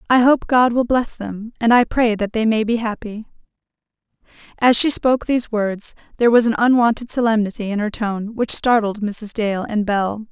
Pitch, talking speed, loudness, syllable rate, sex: 225 Hz, 190 wpm, -18 LUFS, 5.1 syllables/s, female